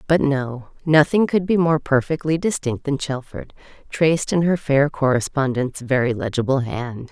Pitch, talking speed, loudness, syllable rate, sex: 140 Hz, 150 wpm, -20 LUFS, 4.7 syllables/s, female